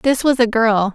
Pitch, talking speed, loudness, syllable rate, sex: 235 Hz, 255 wpm, -15 LUFS, 4.4 syllables/s, female